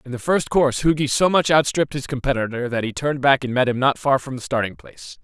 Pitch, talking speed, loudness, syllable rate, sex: 135 Hz, 275 wpm, -20 LUFS, 6.5 syllables/s, male